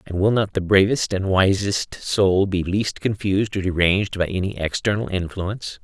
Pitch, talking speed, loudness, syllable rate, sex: 95 Hz, 175 wpm, -21 LUFS, 4.9 syllables/s, male